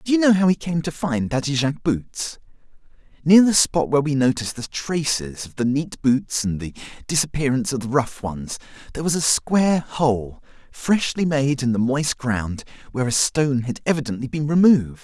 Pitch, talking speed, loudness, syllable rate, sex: 140 Hz, 190 wpm, -21 LUFS, 5.3 syllables/s, male